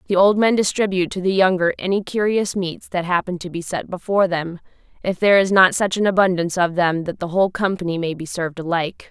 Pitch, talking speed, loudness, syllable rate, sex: 185 Hz, 225 wpm, -19 LUFS, 6.2 syllables/s, female